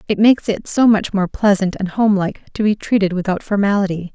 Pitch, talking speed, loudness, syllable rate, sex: 200 Hz, 205 wpm, -17 LUFS, 6.0 syllables/s, female